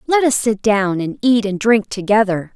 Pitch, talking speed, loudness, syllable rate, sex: 215 Hz, 210 wpm, -16 LUFS, 4.6 syllables/s, female